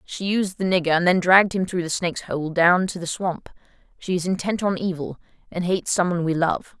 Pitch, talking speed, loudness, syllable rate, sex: 180 Hz, 240 wpm, -22 LUFS, 5.8 syllables/s, female